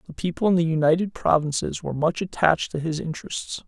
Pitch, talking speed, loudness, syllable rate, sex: 165 Hz, 195 wpm, -23 LUFS, 6.3 syllables/s, male